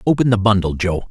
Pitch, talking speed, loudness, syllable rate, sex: 100 Hz, 215 wpm, -17 LUFS, 6.4 syllables/s, male